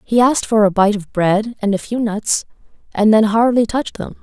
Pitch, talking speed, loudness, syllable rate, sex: 220 Hz, 225 wpm, -16 LUFS, 5.3 syllables/s, female